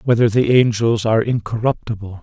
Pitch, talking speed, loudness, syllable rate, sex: 115 Hz, 135 wpm, -17 LUFS, 5.6 syllables/s, male